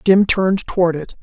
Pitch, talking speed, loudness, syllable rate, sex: 180 Hz, 195 wpm, -16 LUFS, 5.2 syllables/s, female